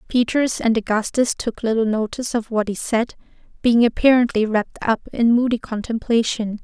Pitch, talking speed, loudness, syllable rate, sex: 230 Hz, 155 wpm, -20 LUFS, 5.2 syllables/s, female